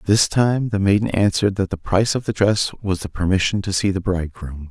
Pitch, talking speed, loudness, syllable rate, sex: 95 Hz, 230 wpm, -19 LUFS, 5.6 syllables/s, male